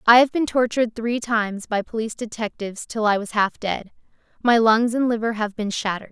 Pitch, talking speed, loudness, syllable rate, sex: 225 Hz, 205 wpm, -22 LUFS, 5.8 syllables/s, female